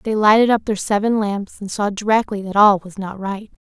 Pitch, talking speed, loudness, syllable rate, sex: 205 Hz, 230 wpm, -18 LUFS, 5.1 syllables/s, female